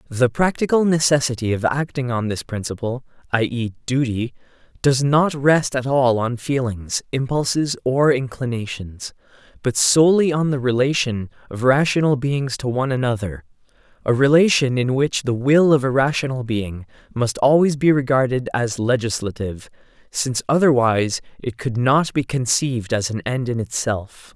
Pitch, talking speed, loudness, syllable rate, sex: 130 Hz, 150 wpm, -19 LUFS, 4.9 syllables/s, male